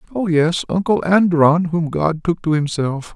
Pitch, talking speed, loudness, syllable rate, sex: 160 Hz, 170 wpm, -17 LUFS, 4.3 syllables/s, male